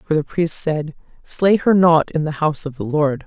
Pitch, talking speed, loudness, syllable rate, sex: 155 Hz, 240 wpm, -18 LUFS, 5.0 syllables/s, female